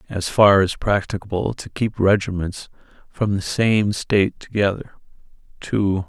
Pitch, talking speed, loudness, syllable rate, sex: 100 Hz, 130 wpm, -20 LUFS, 4.4 syllables/s, male